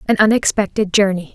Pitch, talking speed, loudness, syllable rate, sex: 205 Hz, 135 wpm, -16 LUFS, 6.1 syllables/s, female